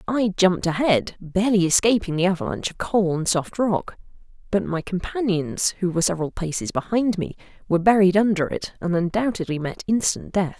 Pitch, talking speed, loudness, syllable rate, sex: 185 Hz, 170 wpm, -22 LUFS, 5.7 syllables/s, female